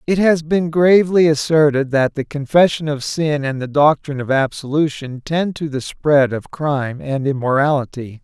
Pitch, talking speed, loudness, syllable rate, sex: 145 Hz, 165 wpm, -17 LUFS, 4.8 syllables/s, male